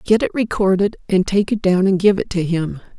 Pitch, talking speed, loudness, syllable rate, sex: 190 Hz, 240 wpm, -17 LUFS, 5.3 syllables/s, female